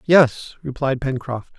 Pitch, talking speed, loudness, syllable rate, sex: 135 Hz, 115 wpm, -20 LUFS, 3.6 syllables/s, male